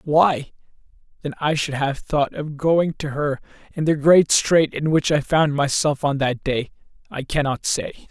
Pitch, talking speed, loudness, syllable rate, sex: 145 Hz, 185 wpm, -20 LUFS, 4.3 syllables/s, male